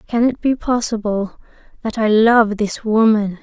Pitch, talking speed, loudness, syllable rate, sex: 220 Hz, 160 wpm, -16 LUFS, 4.2 syllables/s, female